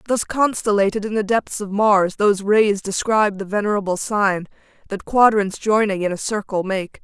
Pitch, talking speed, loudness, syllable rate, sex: 205 Hz, 170 wpm, -19 LUFS, 5.0 syllables/s, female